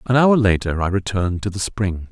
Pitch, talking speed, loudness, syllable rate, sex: 100 Hz, 225 wpm, -19 LUFS, 5.5 syllables/s, male